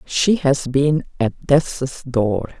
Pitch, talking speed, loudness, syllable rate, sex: 140 Hz, 140 wpm, -19 LUFS, 2.6 syllables/s, female